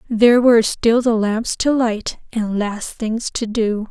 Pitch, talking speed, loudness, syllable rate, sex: 225 Hz, 185 wpm, -17 LUFS, 3.9 syllables/s, female